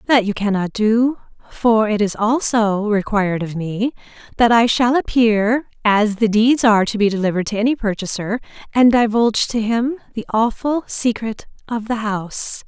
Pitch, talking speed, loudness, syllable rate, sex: 220 Hz, 165 wpm, -17 LUFS, 4.9 syllables/s, female